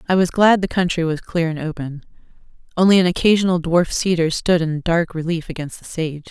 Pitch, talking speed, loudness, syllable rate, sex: 170 Hz, 200 wpm, -18 LUFS, 5.6 syllables/s, female